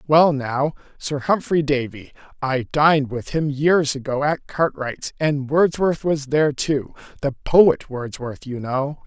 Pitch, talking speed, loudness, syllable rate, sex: 145 Hz, 145 wpm, -20 LUFS, 3.9 syllables/s, male